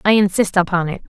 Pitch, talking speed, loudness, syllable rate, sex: 190 Hz, 205 wpm, -17 LUFS, 6.4 syllables/s, female